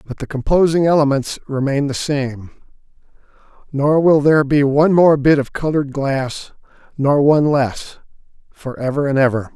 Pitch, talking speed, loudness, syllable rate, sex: 140 Hz, 150 wpm, -16 LUFS, 5.0 syllables/s, male